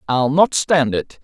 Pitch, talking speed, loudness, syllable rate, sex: 140 Hz, 195 wpm, -16 LUFS, 3.7 syllables/s, male